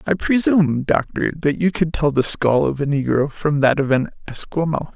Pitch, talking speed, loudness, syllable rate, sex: 145 Hz, 205 wpm, -19 LUFS, 5.0 syllables/s, male